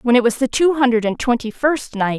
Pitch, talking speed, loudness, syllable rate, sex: 245 Hz, 275 wpm, -17 LUFS, 5.5 syllables/s, female